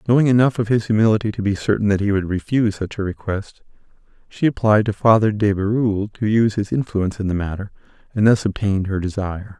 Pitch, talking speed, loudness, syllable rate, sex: 105 Hz, 205 wpm, -19 LUFS, 6.5 syllables/s, male